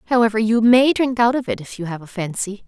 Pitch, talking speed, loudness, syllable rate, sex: 220 Hz, 270 wpm, -18 LUFS, 6.1 syllables/s, female